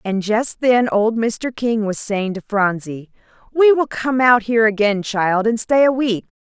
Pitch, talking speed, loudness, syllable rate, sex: 225 Hz, 195 wpm, -17 LUFS, 4.2 syllables/s, female